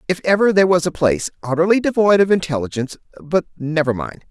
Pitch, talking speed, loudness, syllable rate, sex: 165 Hz, 180 wpm, -17 LUFS, 6.7 syllables/s, male